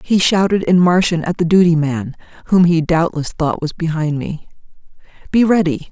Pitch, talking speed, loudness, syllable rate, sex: 170 Hz, 170 wpm, -15 LUFS, 5.0 syllables/s, female